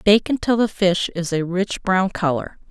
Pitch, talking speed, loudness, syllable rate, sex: 190 Hz, 200 wpm, -20 LUFS, 4.5 syllables/s, female